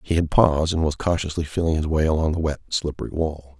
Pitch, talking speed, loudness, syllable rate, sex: 80 Hz, 235 wpm, -22 LUFS, 6.2 syllables/s, male